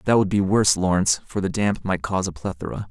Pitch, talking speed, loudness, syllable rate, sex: 95 Hz, 250 wpm, -22 LUFS, 6.7 syllables/s, male